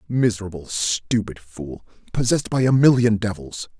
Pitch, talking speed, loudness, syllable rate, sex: 110 Hz, 125 wpm, -20 LUFS, 4.9 syllables/s, male